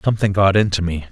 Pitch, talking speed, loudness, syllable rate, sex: 95 Hz, 215 wpm, -17 LUFS, 7.2 syllables/s, male